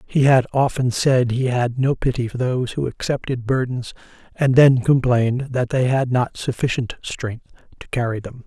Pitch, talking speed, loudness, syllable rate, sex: 125 Hz, 175 wpm, -20 LUFS, 4.8 syllables/s, male